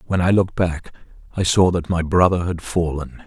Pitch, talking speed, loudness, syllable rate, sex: 90 Hz, 200 wpm, -19 LUFS, 5.2 syllables/s, male